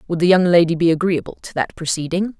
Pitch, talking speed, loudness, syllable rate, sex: 170 Hz, 225 wpm, -18 LUFS, 6.3 syllables/s, female